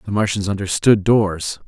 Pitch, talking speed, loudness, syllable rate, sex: 100 Hz, 145 wpm, -18 LUFS, 4.7 syllables/s, male